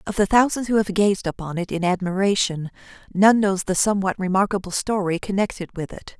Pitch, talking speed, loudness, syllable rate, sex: 195 Hz, 185 wpm, -21 LUFS, 5.7 syllables/s, female